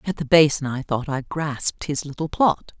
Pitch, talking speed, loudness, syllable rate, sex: 145 Hz, 215 wpm, -22 LUFS, 4.9 syllables/s, female